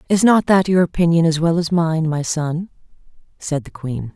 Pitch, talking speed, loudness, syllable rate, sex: 165 Hz, 200 wpm, -18 LUFS, 4.9 syllables/s, female